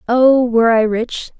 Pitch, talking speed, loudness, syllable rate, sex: 235 Hz, 170 wpm, -14 LUFS, 4.4 syllables/s, female